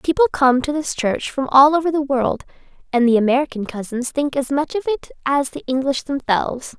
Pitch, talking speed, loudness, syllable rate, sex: 275 Hz, 205 wpm, -19 LUFS, 5.3 syllables/s, female